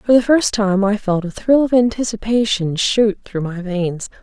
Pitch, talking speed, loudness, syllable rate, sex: 210 Hz, 200 wpm, -17 LUFS, 4.5 syllables/s, female